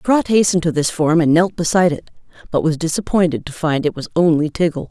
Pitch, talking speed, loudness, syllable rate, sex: 165 Hz, 220 wpm, -17 LUFS, 6.2 syllables/s, female